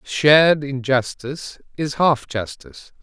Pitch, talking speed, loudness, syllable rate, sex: 130 Hz, 100 wpm, -18 LUFS, 4.2 syllables/s, male